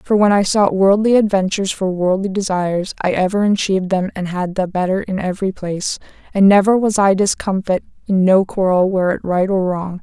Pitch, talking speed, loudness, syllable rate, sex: 190 Hz, 200 wpm, -16 LUFS, 5.6 syllables/s, female